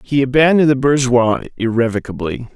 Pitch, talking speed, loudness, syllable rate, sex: 125 Hz, 120 wpm, -15 LUFS, 6.0 syllables/s, male